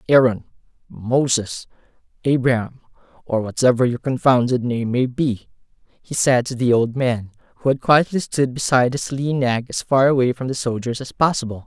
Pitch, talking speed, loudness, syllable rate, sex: 125 Hz, 165 wpm, -19 LUFS, 5.1 syllables/s, male